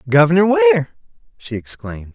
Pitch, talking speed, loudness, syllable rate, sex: 130 Hz, 110 wpm, -15 LUFS, 6.7 syllables/s, male